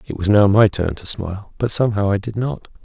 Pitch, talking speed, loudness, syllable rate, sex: 100 Hz, 255 wpm, -18 LUFS, 5.9 syllables/s, male